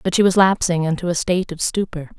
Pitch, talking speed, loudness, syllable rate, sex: 175 Hz, 245 wpm, -19 LUFS, 6.4 syllables/s, female